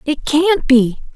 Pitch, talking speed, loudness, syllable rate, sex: 290 Hz, 155 wpm, -14 LUFS, 3.4 syllables/s, female